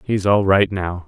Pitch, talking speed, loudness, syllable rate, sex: 95 Hz, 225 wpm, -17 LUFS, 4.1 syllables/s, male